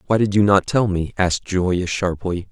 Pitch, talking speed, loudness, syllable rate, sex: 95 Hz, 215 wpm, -19 LUFS, 5.2 syllables/s, male